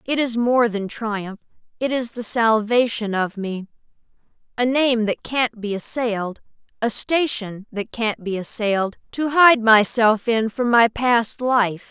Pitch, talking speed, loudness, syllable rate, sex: 230 Hz, 150 wpm, -20 LUFS, 3.9 syllables/s, female